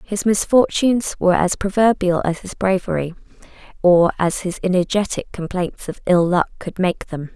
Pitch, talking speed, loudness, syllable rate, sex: 190 Hz, 155 wpm, -19 LUFS, 4.9 syllables/s, female